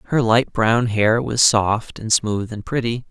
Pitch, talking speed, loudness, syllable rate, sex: 115 Hz, 195 wpm, -18 LUFS, 3.9 syllables/s, male